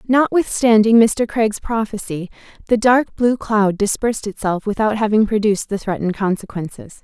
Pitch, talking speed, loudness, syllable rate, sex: 215 Hz, 135 wpm, -17 LUFS, 5.1 syllables/s, female